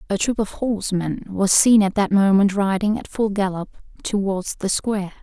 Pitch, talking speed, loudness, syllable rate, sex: 200 Hz, 185 wpm, -20 LUFS, 4.9 syllables/s, female